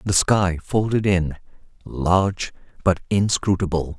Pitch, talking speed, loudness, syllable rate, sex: 90 Hz, 105 wpm, -21 LUFS, 4.0 syllables/s, male